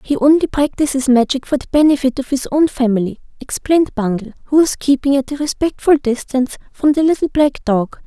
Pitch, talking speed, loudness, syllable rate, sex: 270 Hz, 185 wpm, -16 LUFS, 5.8 syllables/s, female